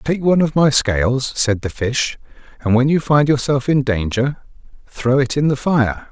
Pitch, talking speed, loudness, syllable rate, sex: 130 Hz, 195 wpm, -17 LUFS, 4.6 syllables/s, male